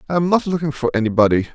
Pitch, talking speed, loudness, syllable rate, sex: 145 Hz, 235 wpm, -18 LUFS, 8.0 syllables/s, male